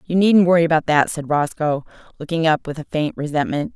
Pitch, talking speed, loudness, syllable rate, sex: 160 Hz, 210 wpm, -19 LUFS, 5.8 syllables/s, female